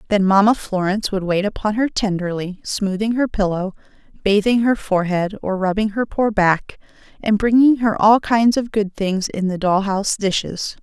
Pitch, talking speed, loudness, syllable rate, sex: 205 Hz, 175 wpm, -18 LUFS, 4.9 syllables/s, female